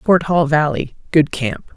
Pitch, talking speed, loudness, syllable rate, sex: 160 Hz, 135 wpm, -17 LUFS, 4.0 syllables/s, female